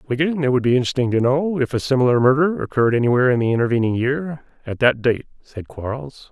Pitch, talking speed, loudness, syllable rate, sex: 130 Hz, 210 wpm, -19 LUFS, 6.6 syllables/s, male